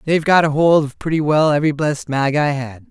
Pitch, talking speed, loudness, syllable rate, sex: 150 Hz, 225 wpm, -16 LUFS, 5.8 syllables/s, male